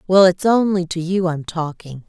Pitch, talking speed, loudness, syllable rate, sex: 175 Hz, 200 wpm, -18 LUFS, 4.7 syllables/s, female